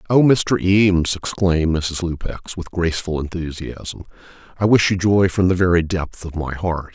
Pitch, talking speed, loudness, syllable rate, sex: 90 Hz, 175 wpm, -19 LUFS, 4.8 syllables/s, male